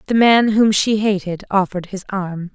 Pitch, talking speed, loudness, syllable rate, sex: 200 Hz, 190 wpm, -17 LUFS, 4.9 syllables/s, female